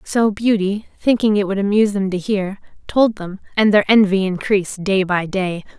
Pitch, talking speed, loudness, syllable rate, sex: 200 Hz, 185 wpm, -17 LUFS, 5.0 syllables/s, female